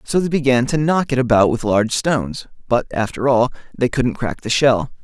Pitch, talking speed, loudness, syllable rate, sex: 125 Hz, 215 wpm, -18 LUFS, 5.3 syllables/s, male